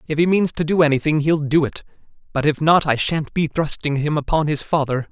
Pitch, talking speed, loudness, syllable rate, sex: 150 Hz, 235 wpm, -19 LUFS, 5.6 syllables/s, male